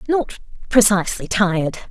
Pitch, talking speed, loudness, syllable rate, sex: 210 Hz, 95 wpm, -18 LUFS, 5.3 syllables/s, female